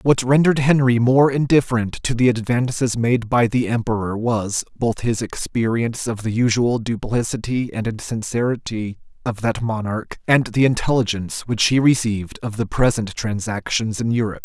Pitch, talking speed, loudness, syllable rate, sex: 115 Hz, 155 wpm, -20 LUFS, 5.0 syllables/s, male